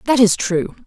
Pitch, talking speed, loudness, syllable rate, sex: 210 Hz, 210 wpm, -17 LUFS, 4.6 syllables/s, female